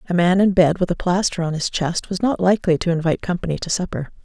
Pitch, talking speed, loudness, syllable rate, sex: 175 Hz, 255 wpm, -19 LUFS, 6.6 syllables/s, female